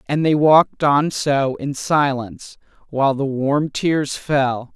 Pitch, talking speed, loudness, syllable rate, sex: 140 Hz, 150 wpm, -18 LUFS, 3.8 syllables/s, female